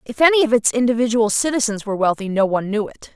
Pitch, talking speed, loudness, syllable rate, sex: 230 Hz, 230 wpm, -18 LUFS, 7.0 syllables/s, female